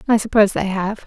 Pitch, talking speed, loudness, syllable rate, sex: 205 Hz, 225 wpm, -18 LUFS, 7.0 syllables/s, female